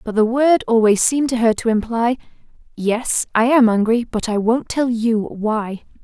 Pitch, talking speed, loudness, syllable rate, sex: 230 Hz, 190 wpm, -17 LUFS, 4.6 syllables/s, female